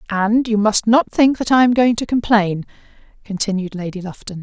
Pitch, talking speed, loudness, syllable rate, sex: 215 Hz, 190 wpm, -16 LUFS, 5.2 syllables/s, female